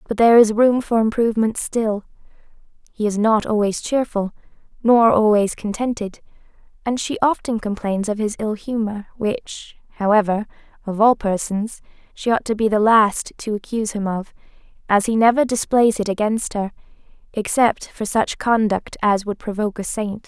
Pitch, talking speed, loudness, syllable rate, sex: 215 Hz, 160 wpm, -19 LUFS, 4.9 syllables/s, female